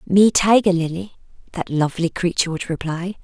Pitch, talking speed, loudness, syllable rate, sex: 180 Hz, 150 wpm, -19 LUFS, 5.3 syllables/s, female